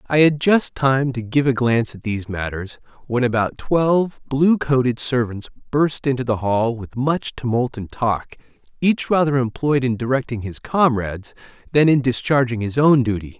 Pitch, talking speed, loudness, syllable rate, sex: 125 Hz, 175 wpm, -19 LUFS, 4.8 syllables/s, male